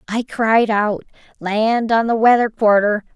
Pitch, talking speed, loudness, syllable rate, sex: 220 Hz, 150 wpm, -16 LUFS, 4.0 syllables/s, female